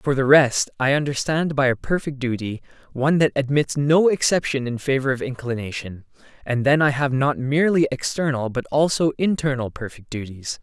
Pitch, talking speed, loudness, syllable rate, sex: 135 Hz, 170 wpm, -21 LUFS, 5.3 syllables/s, male